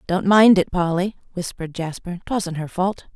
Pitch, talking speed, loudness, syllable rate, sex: 180 Hz, 170 wpm, -20 LUFS, 4.8 syllables/s, female